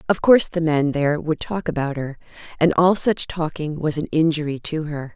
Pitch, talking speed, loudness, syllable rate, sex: 155 Hz, 210 wpm, -20 LUFS, 5.4 syllables/s, female